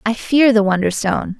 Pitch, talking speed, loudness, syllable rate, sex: 220 Hz, 170 wpm, -15 LUFS, 5.4 syllables/s, female